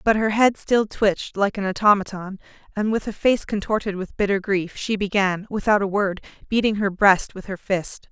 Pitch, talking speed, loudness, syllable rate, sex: 200 Hz, 200 wpm, -21 LUFS, 5.0 syllables/s, female